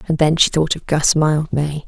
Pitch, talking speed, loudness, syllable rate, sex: 155 Hz, 225 wpm, -16 LUFS, 4.7 syllables/s, female